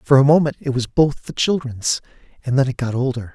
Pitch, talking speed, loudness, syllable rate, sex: 130 Hz, 235 wpm, -19 LUFS, 5.7 syllables/s, male